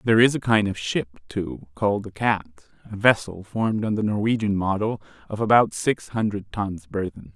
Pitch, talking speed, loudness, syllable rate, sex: 105 Hz, 190 wpm, -23 LUFS, 5.2 syllables/s, male